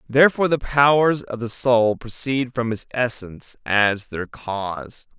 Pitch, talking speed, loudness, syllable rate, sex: 120 Hz, 150 wpm, -20 LUFS, 4.4 syllables/s, male